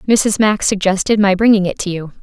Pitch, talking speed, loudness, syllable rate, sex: 200 Hz, 215 wpm, -14 LUFS, 5.6 syllables/s, female